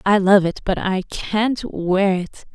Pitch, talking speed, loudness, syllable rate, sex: 195 Hz, 190 wpm, -19 LUFS, 3.9 syllables/s, female